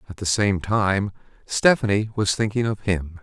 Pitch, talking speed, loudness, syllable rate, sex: 100 Hz, 170 wpm, -22 LUFS, 4.5 syllables/s, male